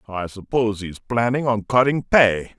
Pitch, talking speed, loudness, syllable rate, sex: 115 Hz, 185 wpm, -20 LUFS, 5.1 syllables/s, male